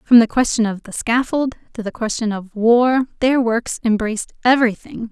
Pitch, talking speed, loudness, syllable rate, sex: 230 Hz, 175 wpm, -18 LUFS, 5.1 syllables/s, female